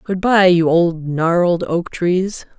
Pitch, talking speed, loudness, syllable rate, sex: 175 Hz, 140 wpm, -16 LUFS, 3.4 syllables/s, female